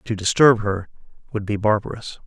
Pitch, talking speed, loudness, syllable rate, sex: 110 Hz, 160 wpm, -20 LUFS, 5.4 syllables/s, male